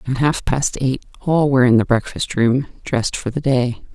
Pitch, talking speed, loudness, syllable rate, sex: 130 Hz, 215 wpm, -18 LUFS, 5.3 syllables/s, female